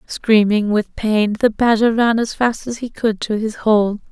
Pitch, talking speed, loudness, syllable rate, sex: 220 Hz, 205 wpm, -17 LUFS, 4.2 syllables/s, female